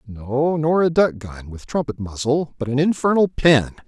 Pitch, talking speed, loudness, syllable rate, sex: 140 Hz, 185 wpm, -19 LUFS, 4.5 syllables/s, male